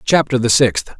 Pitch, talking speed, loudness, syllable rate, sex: 125 Hz, 180 wpm, -15 LUFS, 4.6 syllables/s, male